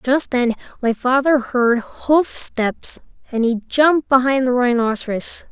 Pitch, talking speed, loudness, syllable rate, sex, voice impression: 255 Hz, 130 wpm, -18 LUFS, 4.1 syllables/s, female, slightly gender-neutral, slightly young, tensed, slightly bright, clear, cute, friendly